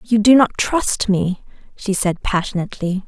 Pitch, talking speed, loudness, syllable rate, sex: 200 Hz, 155 wpm, -18 LUFS, 4.7 syllables/s, female